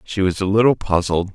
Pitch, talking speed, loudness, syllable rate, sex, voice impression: 95 Hz, 225 wpm, -18 LUFS, 5.7 syllables/s, male, masculine, middle-aged, thick, tensed, powerful, slightly hard, clear, cool, calm, mature, reassuring, wild, lively